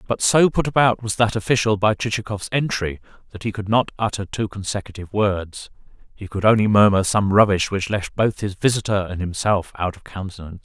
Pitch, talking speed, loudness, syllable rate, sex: 105 Hz, 185 wpm, -20 LUFS, 5.7 syllables/s, male